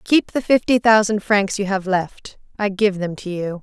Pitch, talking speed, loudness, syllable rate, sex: 200 Hz, 200 wpm, -19 LUFS, 4.5 syllables/s, female